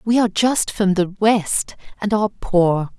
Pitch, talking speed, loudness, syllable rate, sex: 200 Hz, 180 wpm, -18 LUFS, 4.3 syllables/s, female